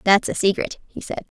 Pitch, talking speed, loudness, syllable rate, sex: 195 Hz, 215 wpm, -22 LUFS, 5.4 syllables/s, female